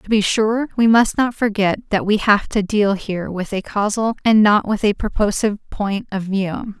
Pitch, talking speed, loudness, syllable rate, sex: 210 Hz, 210 wpm, -18 LUFS, 4.7 syllables/s, female